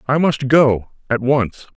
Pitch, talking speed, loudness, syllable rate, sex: 130 Hz, 135 wpm, -17 LUFS, 3.6 syllables/s, male